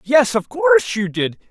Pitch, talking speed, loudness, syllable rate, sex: 240 Hz, 200 wpm, -17 LUFS, 4.6 syllables/s, male